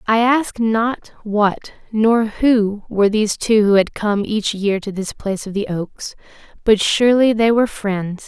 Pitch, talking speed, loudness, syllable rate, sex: 215 Hz, 180 wpm, -17 LUFS, 4.4 syllables/s, female